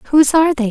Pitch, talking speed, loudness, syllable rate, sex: 285 Hz, 255 wpm, -13 LUFS, 6.9 syllables/s, female